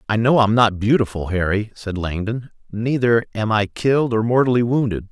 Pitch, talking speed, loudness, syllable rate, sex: 110 Hz, 175 wpm, -19 LUFS, 5.2 syllables/s, male